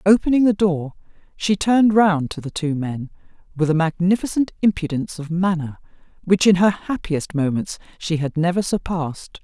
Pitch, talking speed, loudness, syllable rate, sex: 175 Hz, 160 wpm, -20 LUFS, 5.2 syllables/s, female